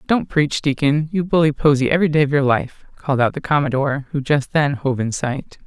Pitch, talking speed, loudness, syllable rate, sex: 145 Hz, 225 wpm, -18 LUFS, 5.7 syllables/s, female